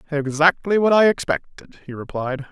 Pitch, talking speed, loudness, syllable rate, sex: 160 Hz, 145 wpm, -19 LUFS, 5.0 syllables/s, male